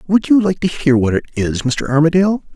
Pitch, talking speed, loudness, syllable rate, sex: 160 Hz, 235 wpm, -15 LUFS, 5.9 syllables/s, male